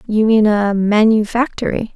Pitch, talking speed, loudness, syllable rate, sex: 215 Hz, 125 wpm, -15 LUFS, 4.6 syllables/s, female